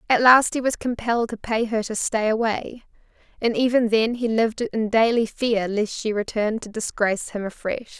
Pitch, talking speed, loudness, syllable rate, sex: 225 Hz, 195 wpm, -22 LUFS, 5.1 syllables/s, female